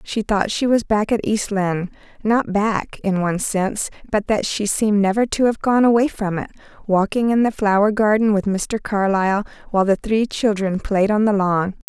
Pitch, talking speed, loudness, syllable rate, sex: 205 Hz, 190 wpm, -19 LUFS, 5.1 syllables/s, female